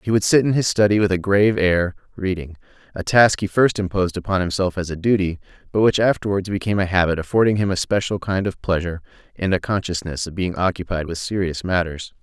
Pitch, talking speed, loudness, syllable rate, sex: 95 Hz, 205 wpm, -20 LUFS, 6.2 syllables/s, male